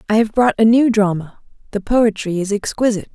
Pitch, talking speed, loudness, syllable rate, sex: 215 Hz, 190 wpm, -16 LUFS, 5.8 syllables/s, female